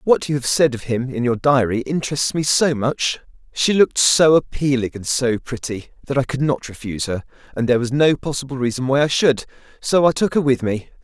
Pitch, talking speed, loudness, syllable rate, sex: 135 Hz, 225 wpm, -19 LUFS, 5.6 syllables/s, male